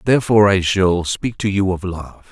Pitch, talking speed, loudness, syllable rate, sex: 95 Hz, 205 wpm, -17 LUFS, 5.2 syllables/s, male